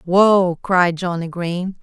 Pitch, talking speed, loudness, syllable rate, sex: 180 Hz, 130 wpm, -17 LUFS, 3.1 syllables/s, female